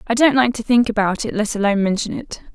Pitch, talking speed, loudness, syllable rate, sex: 220 Hz, 260 wpm, -18 LUFS, 6.5 syllables/s, female